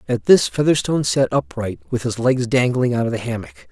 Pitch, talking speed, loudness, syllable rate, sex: 120 Hz, 210 wpm, -19 LUFS, 5.6 syllables/s, male